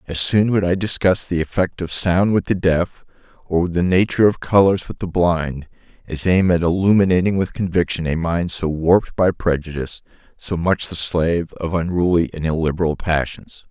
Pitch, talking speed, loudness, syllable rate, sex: 90 Hz, 180 wpm, -18 LUFS, 5.1 syllables/s, male